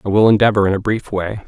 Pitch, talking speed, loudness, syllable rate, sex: 105 Hz, 285 wpm, -16 LUFS, 6.8 syllables/s, male